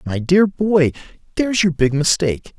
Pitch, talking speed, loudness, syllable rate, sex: 165 Hz, 160 wpm, -17 LUFS, 5.1 syllables/s, male